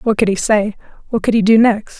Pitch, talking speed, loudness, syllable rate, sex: 215 Hz, 270 wpm, -15 LUFS, 5.4 syllables/s, female